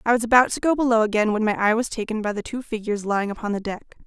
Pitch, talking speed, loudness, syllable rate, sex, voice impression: 220 Hz, 295 wpm, -22 LUFS, 7.4 syllables/s, female, very feminine, middle-aged, very thin, tensed, slightly powerful, bright, hard, clear, fluent, slightly raspy, slightly cool, intellectual, very refreshing, slightly sincere, slightly calm, slightly friendly, slightly unique, elegant, slightly wild, sweet, very lively, slightly strict, slightly intense, light